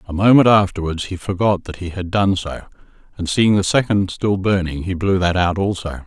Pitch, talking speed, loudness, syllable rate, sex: 95 Hz, 210 wpm, -18 LUFS, 5.3 syllables/s, male